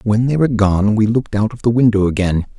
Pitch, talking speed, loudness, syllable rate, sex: 110 Hz, 255 wpm, -15 LUFS, 6.2 syllables/s, male